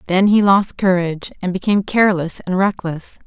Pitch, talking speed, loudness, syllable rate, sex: 185 Hz, 165 wpm, -17 LUFS, 5.5 syllables/s, female